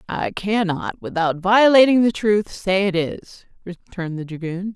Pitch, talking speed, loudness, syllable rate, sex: 190 Hz, 150 wpm, -19 LUFS, 4.3 syllables/s, female